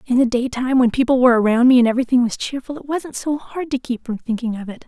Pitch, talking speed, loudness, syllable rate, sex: 250 Hz, 270 wpm, -18 LUFS, 6.7 syllables/s, female